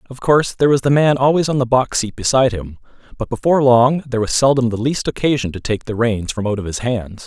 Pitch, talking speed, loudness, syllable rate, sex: 125 Hz, 255 wpm, -16 LUFS, 6.3 syllables/s, male